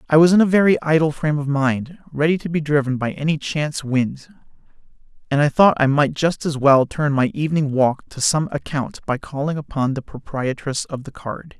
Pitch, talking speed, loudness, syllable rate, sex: 145 Hz, 205 wpm, -19 LUFS, 5.3 syllables/s, male